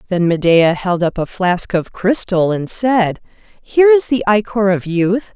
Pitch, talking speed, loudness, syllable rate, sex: 195 Hz, 180 wpm, -15 LUFS, 4.3 syllables/s, female